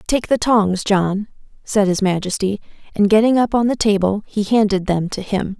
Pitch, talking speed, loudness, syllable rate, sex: 205 Hz, 195 wpm, -17 LUFS, 4.9 syllables/s, female